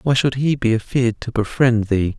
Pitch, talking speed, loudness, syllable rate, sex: 120 Hz, 220 wpm, -19 LUFS, 5.3 syllables/s, male